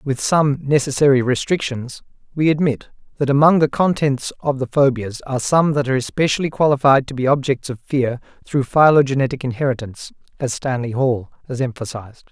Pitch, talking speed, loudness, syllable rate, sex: 135 Hz, 155 wpm, -18 LUFS, 5.7 syllables/s, male